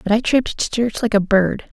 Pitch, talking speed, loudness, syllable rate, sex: 220 Hz, 265 wpm, -18 LUFS, 5.3 syllables/s, female